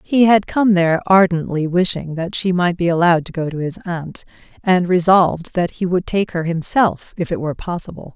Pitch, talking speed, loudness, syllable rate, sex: 175 Hz, 205 wpm, -17 LUFS, 5.3 syllables/s, female